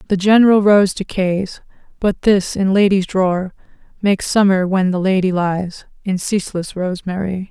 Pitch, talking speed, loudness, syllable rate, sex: 190 Hz, 145 wpm, -16 LUFS, 4.9 syllables/s, female